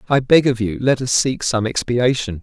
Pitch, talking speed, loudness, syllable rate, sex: 120 Hz, 225 wpm, -17 LUFS, 5.0 syllables/s, male